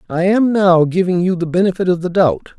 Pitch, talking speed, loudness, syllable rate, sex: 180 Hz, 230 wpm, -15 LUFS, 5.5 syllables/s, male